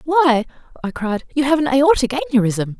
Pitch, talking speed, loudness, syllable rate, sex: 245 Hz, 170 wpm, -17 LUFS, 4.9 syllables/s, female